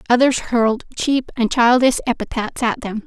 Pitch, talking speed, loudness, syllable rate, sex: 240 Hz, 155 wpm, -18 LUFS, 5.1 syllables/s, female